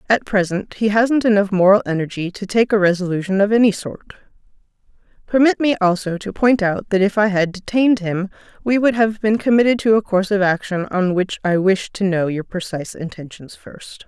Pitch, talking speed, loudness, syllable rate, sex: 200 Hz, 195 wpm, -17 LUFS, 5.5 syllables/s, female